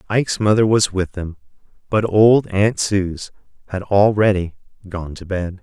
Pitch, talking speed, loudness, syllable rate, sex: 100 Hz, 150 wpm, -17 LUFS, 4.3 syllables/s, male